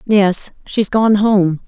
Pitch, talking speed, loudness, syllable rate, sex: 200 Hz, 145 wpm, -15 LUFS, 2.8 syllables/s, female